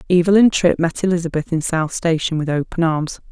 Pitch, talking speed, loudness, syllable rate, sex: 170 Hz, 180 wpm, -18 LUFS, 5.6 syllables/s, female